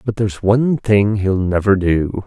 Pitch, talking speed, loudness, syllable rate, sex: 100 Hz, 185 wpm, -16 LUFS, 4.6 syllables/s, male